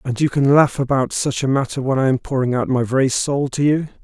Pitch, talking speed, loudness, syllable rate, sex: 135 Hz, 270 wpm, -18 LUFS, 5.8 syllables/s, male